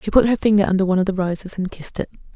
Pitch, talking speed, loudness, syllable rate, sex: 195 Hz, 305 wpm, -20 LUFS, 8.8 syllables/s, female